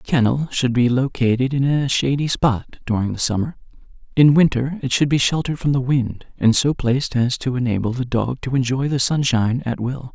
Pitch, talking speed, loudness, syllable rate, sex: 130 Hz, 205 wpm, -19 LUFS, 5.4 syllables/s, male